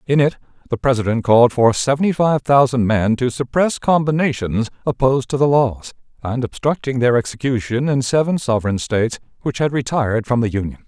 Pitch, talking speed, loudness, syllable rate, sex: 125 Hz, 170 wpm, -18 LUFS, 5.7 syllables/s, male